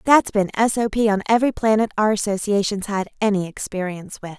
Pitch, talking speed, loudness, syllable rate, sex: 205 Hz, 165 wpm, -20 LUFS, 5.8 syllables/s, female